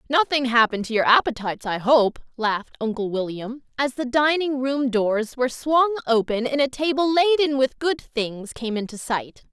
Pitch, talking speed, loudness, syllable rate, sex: 255 Hz, 175 wpm, -22 LUFS, 5.2 syllables/s, female